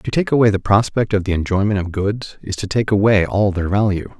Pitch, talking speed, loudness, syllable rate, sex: 100 Hz, 245 wpm, -18 LUFS, 5.6 syllables/s, male